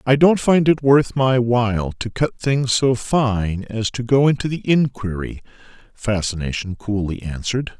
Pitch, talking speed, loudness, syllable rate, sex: 120 Hz, 160 wpm, -19 LUFS, 4.4 syllables/s, male